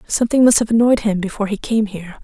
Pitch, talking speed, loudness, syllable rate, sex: 215 Hz, 240 wpm, -16 LUFS, 7.4 syllables/s, female